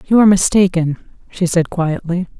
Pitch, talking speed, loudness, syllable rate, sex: 180 Hz, 150 wpm, -15 LUFS, 5.0 syllables/s, female